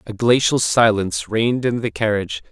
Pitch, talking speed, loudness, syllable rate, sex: 115 Hz, 165 wpm, -18 LUFS, 5.6 syllables/s, male